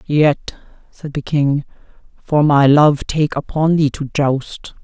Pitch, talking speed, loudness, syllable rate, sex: 145 Hz, 150 wpm, -16 LUFS, 3.5 syllables/s, female